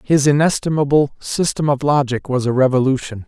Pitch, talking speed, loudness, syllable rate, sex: 140 Hz, 145 wpm, -17 LUFS, 5.4 syllables/s, male